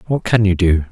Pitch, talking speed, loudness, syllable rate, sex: 100 Hz, 260 wpm, -15 LUFS, 5.5 syllables/s, male